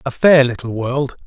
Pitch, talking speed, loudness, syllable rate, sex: 135 Hz, 190 wpm, -16 LUFS, 4.7 syllables/s, male